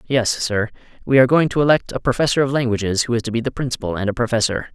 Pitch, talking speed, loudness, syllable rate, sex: 120 Hz, 255 wpm, -19 LUFS, 7.1 syllables/s, male